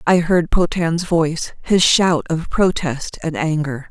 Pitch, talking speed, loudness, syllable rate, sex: 165 Hz, 155 wpm, -18 LUFS, 3.8 syllables/s, female